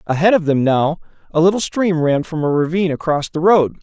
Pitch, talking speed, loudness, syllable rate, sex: 165 Hz, 220 wpm, -16 LUFS, 5.7 syllables/s, male